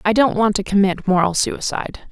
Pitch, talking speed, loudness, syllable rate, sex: 205 Hz, 200 wpm, -18 LUFS, 5.5 syllables/s, female